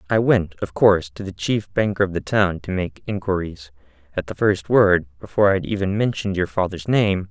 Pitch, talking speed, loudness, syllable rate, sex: 95 Hz, 215 wpm, -20 LUFS, 5.5 syllables/s, male